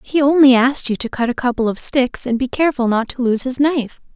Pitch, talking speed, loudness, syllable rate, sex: 255 Hz, 260 wpm, -16 LUFS, 6.1 syllables/s, female